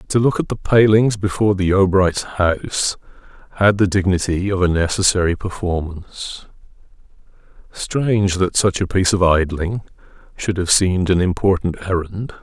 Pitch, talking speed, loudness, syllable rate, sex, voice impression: 95 Hz, 140 wpm, -18 LUFS, 5.0 syllables/s, male, masculine, very adult-like, slightly thick, sincere, calm, slightly wild